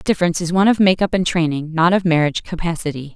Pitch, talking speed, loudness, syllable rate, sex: 170 Hz, 230 wpm, -17 LUFS, 7.7 syllables/s, female